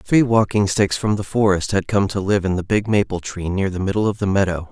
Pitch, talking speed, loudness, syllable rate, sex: 100 Hz, 265 wpm, -19 LUFS, 5.6 syllables/s, male